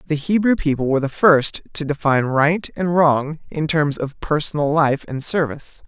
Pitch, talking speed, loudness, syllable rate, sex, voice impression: 150 Hz, 185 wpm, -19 LUFS, 5.0 syllables/s, male, masculine, adult-like, tensed, powerful, bright, slightly muffled, intellectual, slightly refreshing, calm, friendly, slightly reassuring, lively, kind, slightly modest